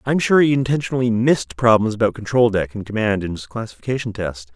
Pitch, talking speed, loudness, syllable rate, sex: 115 Hz, 195 wpm, -19 LUFS, 6.3 syllables/s, male